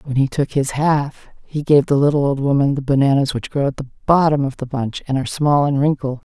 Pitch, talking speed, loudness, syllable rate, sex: 140 Hz, 245 wpm, -18 LUFS, 5.8 syllables/s, female